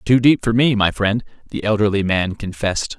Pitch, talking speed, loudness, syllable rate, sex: 105 Hz, 200 wpm, -18 LUFS, 5.3 syllables/s, male